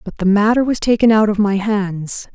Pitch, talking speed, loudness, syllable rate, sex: 210 Hz, 230 wpm, -15 LUFS, 5.0 syllables/s, female